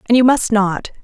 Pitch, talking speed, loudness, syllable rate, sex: 225 Hz, 230 wpm, -15 LUFS, 4.7 syllables/s, female